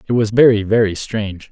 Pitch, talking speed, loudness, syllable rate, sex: 110 Hz, 200 wpm, -15 LUFS, 5.9 syllables/s, male